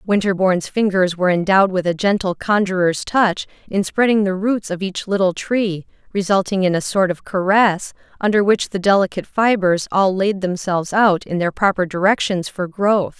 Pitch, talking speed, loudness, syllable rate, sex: 190 Hz, 175 wpm, -18 LUFS, 5.2 syllables/s, female